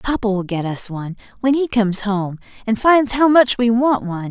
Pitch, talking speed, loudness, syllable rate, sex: 225 Hz, 225 wpm, -17 LUFS, 5.4 syllables/s, female